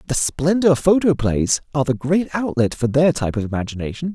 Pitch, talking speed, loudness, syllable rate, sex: 145 Hz, 175 wpm, -19 LUFS, 5.8 syllables/s, male